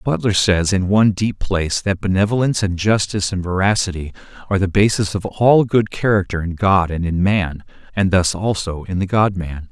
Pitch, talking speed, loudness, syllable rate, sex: 95 Hz, 190 wpm, -18 LUFS, 5.4 syllables/s, male